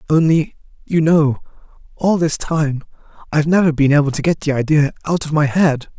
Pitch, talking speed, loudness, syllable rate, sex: 150 Hz, 180 wpm, -16 LUFS, 5.4 syllables/s, male